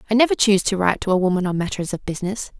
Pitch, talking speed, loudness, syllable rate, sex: 200 Hz, 280 wpm, -20 LUFS, 8.1 syllables/s, female